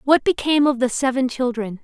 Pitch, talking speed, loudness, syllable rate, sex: 260 Hz, 195 wpm, -19 LUFS, 5.9 syllables/s, female